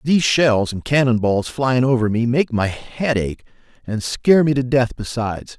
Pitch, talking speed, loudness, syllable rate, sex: 125 Hz, 195 wpm, -18 LUFS, 4.8 syllables/s, male